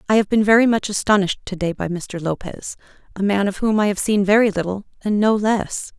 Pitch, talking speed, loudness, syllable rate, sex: 200 Hz, 220 wpm, -19 LUFS, 5.8 syllables/s, female